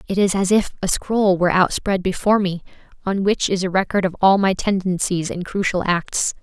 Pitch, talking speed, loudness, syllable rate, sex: 190 Hz, 205 wpm, -19 LUFS, 5.3 syllables/s, female